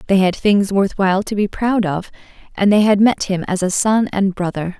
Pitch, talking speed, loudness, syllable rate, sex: 195 Hz, 240 wpm, -16 LUFS, 5.0 syllables/s, female